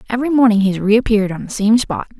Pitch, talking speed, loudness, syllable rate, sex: 220 Hz, 245 wpm, -15 LUFS, 7.4 syllables/s, female